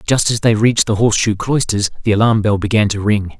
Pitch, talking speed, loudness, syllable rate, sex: 110 Hz, 230 wpm, -15 LUFS, 6.1 syllables/s, male